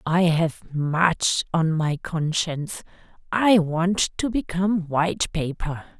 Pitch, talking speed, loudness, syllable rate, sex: 170 Hz, 120 wpm, -23 LUFS, 3.6 syllables/s, female